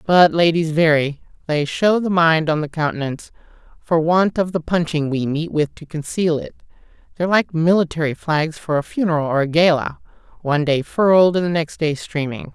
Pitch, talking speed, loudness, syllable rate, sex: 160 Hz, 180 wpm, -18 LUFS, 5.1 syllables/s, female